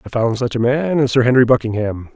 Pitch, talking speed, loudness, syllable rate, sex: 125 Hz, 250 wpm, -16 LUFS, 5.9 syllables/s, male